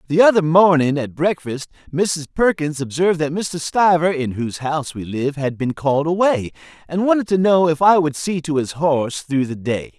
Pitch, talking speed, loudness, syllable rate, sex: 160 Hz, 205 wpm, -18 LUFS, 5.2 syllables/s, male